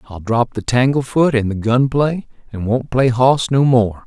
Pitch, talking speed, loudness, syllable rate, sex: 125 Hz, 205 wpm, -16 LUFS, 4.3 syllables/s, male